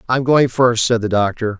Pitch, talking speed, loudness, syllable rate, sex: 115 Hz, 225 wpm, -15 LUFS, 5.0 syllables/s, male